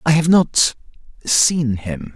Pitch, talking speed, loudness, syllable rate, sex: 130 Hz, 140 wpm, -16 LUFS, 3.2 syllables/s, male